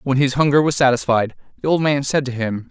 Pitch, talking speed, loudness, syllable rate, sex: 135 Hz, 245 wpm, -18 LUFS, 6.0 syllables/s, male